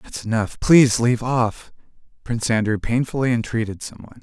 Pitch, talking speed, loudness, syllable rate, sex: 115 Hz, 140 wpm, -20 LUFS, 5.8 syllables/s, male